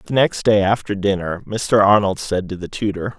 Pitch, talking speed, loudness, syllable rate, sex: 100 Hz, 205 wpm, -18 LUFS, 4.8 syllables/s, male